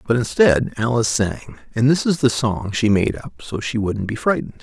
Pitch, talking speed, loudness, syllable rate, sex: 115 Hz, 220 wpm, -19 LUFS, 5.6 syllables/s, male